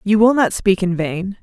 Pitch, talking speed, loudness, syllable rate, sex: 195 Hz, 255 wpm, -16 LUFS, 4.6 syllables/s, female